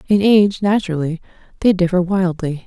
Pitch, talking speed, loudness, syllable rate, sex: 185 Hz, 135 wpm, -16 LUFS, 5.8 syllables/s, female